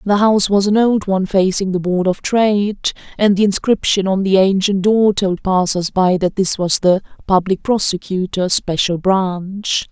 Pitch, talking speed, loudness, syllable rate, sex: 195 Hz, 175 wpm, -16 LUFS, 4.6 syllables/s, female